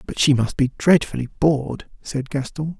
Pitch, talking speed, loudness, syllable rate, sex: 145 Hz, 170 wpm, -20 LUFS, 5.1 syllables/s, male